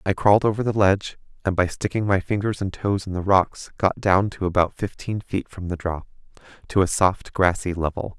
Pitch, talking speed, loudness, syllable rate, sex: 95 Hz, 215 wpm, -22 LUFS, 5.3 syllables/s, male